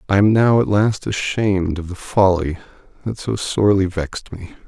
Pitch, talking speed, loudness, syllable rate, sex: 95 Hz, 180 wpm, -18 LUFS, 5.1 syllables/s, male